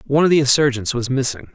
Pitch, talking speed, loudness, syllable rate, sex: 135 Hz, 235 wpm, -17 LUFS, 7.4 syllables/s, male